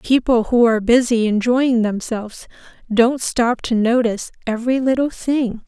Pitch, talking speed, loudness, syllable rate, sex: 235 Hz, 140 wpm, -17 LUFS, 4.8 syllables/s, female